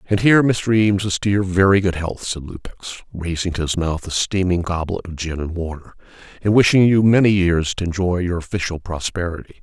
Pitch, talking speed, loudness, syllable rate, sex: 90 Hz, 205 wpm, -19 LUFS, 5.5 syllables/s, male